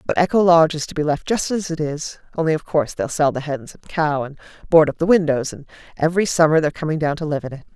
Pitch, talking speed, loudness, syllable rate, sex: 155 Hz, 270 wpm, -19 LUFS, 6.6 syllables/s, female